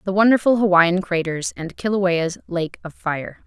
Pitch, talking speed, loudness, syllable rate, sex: 185 Hz, 155 wpm, -20 LUFS, 4.4 syllables/s, female